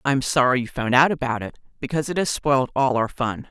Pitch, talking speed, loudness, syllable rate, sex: 130 Hz, 255 wpm, -21 LUFS, 6.3 syllables/s, female